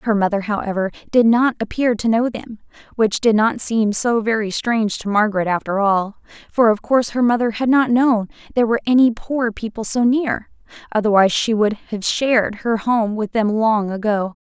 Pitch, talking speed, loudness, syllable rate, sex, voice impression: 220 Hz, 190 wpm, -18 LUFS, 5.2 syllables/s, female, feminine, adult-like, slightly clear, unique, slightly lively